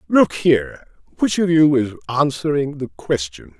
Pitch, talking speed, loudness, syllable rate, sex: 135 Hz, 150 wpm, -18 LUFS, 4.5 syllables/s, male